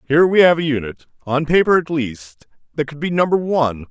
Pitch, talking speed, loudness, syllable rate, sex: 145 Hz, 215 wpm, -17 LUFS, 5.8 syllables/s, male